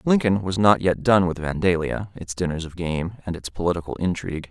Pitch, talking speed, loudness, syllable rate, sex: 90 Hz, 200 wpm, -23 LUFS, 5.7 syllables/s, male